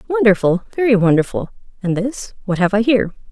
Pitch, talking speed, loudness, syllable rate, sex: 215 Hz, 125 wpm, -17 LUFS, 6.2 syllables/s, female